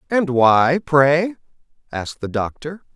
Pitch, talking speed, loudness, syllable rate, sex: 150 Hz, 120 wpm, -18 LUFS, 3.9 syllables/s, male